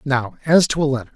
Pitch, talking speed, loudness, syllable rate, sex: 140 Hz, 260 wpm, -18 LUFS, 6.2 syllables/s, male